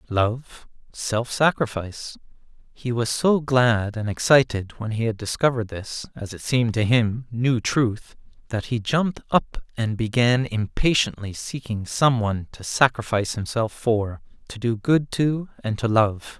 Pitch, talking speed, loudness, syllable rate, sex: 115 Hz, 155 wpm, -23 LUFS, 4.3 syllables/s, male